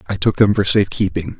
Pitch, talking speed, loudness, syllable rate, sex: 95 Hz, 260 wpm, -16 LUFS, 6.6 syllables/s, male